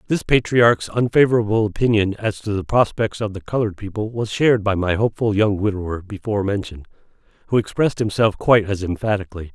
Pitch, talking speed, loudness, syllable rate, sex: 105 Hz, 170 wpm, -19 LUFS, 6.3 syllables/s, male